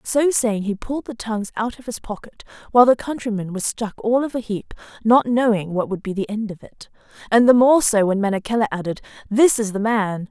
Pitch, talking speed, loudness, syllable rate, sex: 220 Hz, 225 wpm, -20 LUFS, 5.8 syllables/s, female